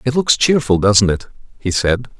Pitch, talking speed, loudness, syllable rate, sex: 115 Hz, 190 wpm, -15 LUFS, 4.7 syllables/s, male